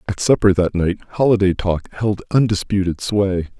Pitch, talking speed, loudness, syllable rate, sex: 100 Hz, 150 wpm, -18 LUFS, 4.8 syllables/s, male